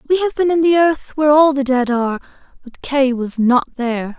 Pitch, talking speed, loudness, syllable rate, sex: 275 Hz, 230 wpm, -16 LUFS, 5.5 syllables/s, female